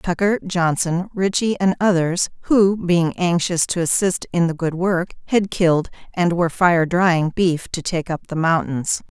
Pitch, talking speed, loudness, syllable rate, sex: 175 Hz, 170 wpm, -19 LUFS, 4.3 syllables/s, female